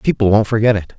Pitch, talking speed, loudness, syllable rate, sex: 110 Hz, 245 wpm, -15 LUFS, 6.4 syllables/s, male